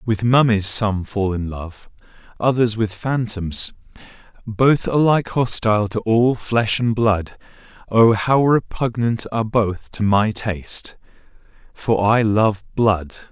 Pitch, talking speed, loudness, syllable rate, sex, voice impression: 110 Hz, 125 wpm, -19 LUFS, 3.8 syllables/s, male, masculine, adult-like, tensed, powerful, clear, slightly raspy, slightly cool, intellectual, friendly, wild, lively, slightly intense